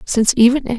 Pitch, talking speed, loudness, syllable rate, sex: 240 Hz, 230 wpm, -14 LUFS, 7.0 syllables/s, female